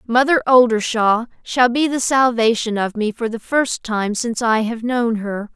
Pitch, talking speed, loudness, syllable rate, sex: 235 Hz, 185 wpm, -18 LUFS, 4.4 syllables/s, female